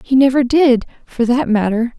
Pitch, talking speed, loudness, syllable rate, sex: 250 Hz, 180 wpm, -14 LUFS, 4.7 syllables/s, female